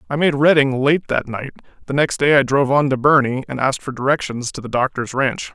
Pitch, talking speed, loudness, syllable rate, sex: 135 Hz, 240 wpm, -18 LUFS, 5.9 syllables/s, male